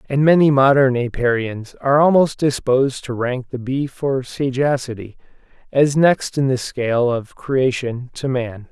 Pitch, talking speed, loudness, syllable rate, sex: 130 Hz, 150 wpm, -18 LUFS, 4.4 syllables/s, male